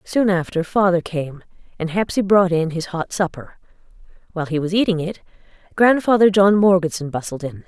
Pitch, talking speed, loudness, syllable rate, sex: 180 Hz, 165 wpm, -18 LUFS, 5.4 syllables/s, female